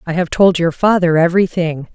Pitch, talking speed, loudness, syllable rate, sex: 170 Hz, 185 wpm, -14 LUFS, 5.6 syllables/s, female